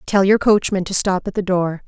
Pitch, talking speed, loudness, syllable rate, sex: 190 Hz, 255 wpm, -17 LUFS, 5.2 syllables/s, female